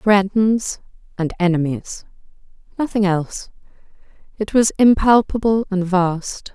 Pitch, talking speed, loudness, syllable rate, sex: 200 Hz, 80 wpm, -18 LUFS, 3.9 syllables/s, female